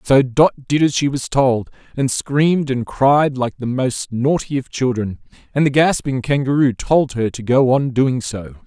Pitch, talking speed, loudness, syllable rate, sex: 130 Hz, 195 wpm, -17 LUFS, 4.3 syllables/s, male